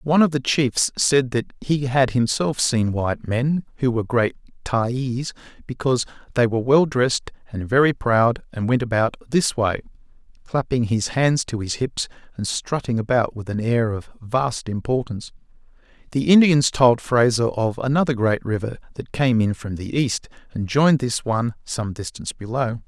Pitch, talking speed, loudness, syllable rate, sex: 120 Hz, 170 wpm, -21 LUFS, 4.9 syllables/s, male